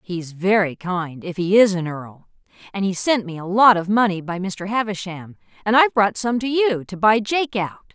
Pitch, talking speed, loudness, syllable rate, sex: 195 Hz, 220 wpm, -20 LUFS, 4.9 syllables/s, female